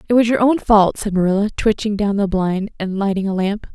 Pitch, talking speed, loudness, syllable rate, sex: 205 Hz, 240 wpm, -17 LUFS, 5.6 syllables/s, female